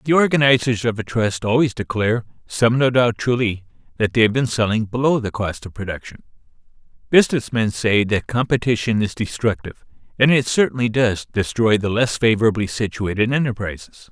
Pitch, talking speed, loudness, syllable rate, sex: 115 Hz, 160 wpm, -19 LUFS, 5.6 syllables/s, male